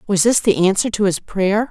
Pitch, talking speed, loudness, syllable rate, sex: 200 Hz, 245 wpm, -17 LUFS, 5.2 syllables/s, female